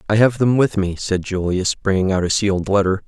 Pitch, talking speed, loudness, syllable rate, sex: 100 Hz, 235 wpm, -18 LUFS, 5.6 syllables/s, male